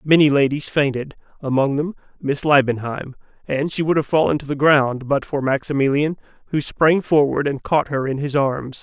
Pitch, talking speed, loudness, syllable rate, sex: 140 Hz, 175 wpm, -19 LUFS, 5.0 syllables/s, male